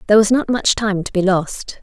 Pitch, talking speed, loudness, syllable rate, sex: 205 Hz, 265 wpm, -16 LUFS, 5.5 syllables/s, female